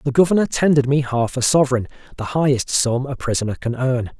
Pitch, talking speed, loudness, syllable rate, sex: 135 Hz, 200 wpm, -19 LUFS, 6.3 syllables/s, male